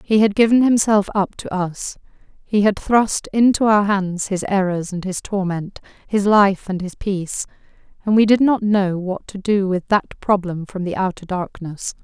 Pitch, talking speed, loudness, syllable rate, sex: 195 Hz, 190 wpm, -19 LUFS, 4.5 syllables/s, female